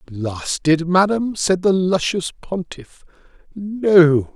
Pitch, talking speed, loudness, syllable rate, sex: 175 Hz, 95 wpm, -18 LUFS, 3.1 syllables/s, male